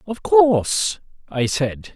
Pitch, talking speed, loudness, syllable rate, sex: 180 Hz, 125 wpm, -18 LUFS, 3.2 syllables/s, male